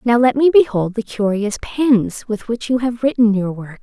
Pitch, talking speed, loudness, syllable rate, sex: 230 Hz, 220 wpm, -17 LUFS, 4.6 syllables/s, female